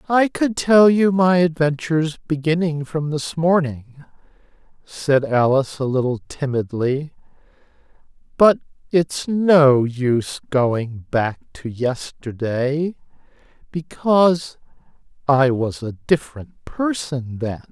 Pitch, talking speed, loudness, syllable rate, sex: 145 Hz, 100 wpm, -19 LUFS, 3.6 syllables/s, male